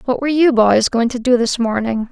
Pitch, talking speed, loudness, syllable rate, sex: 245 Hz, 255 wpm, -15 LUFS, 5.6 syllables/s, female